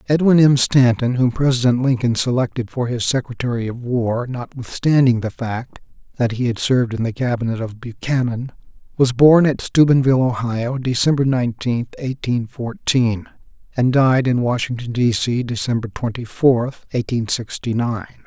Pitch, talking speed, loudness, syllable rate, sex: 125 Hz, 150 wpm, -18 LUFS, 4.9 syllables/s, male